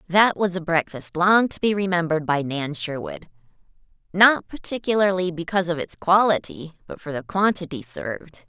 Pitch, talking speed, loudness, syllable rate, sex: 170 Hz, 155 wpm, -22 LUFS, 5.2 syllables/s, female